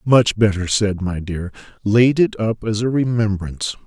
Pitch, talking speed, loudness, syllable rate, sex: 105 Hz, 170 wpm, -19 LUFS, 4.4 syllables/s, male